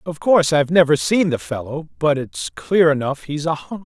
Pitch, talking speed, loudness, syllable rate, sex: 160 Hz, 215 wpm, -18 LUFS, 5.5 syllables/s, female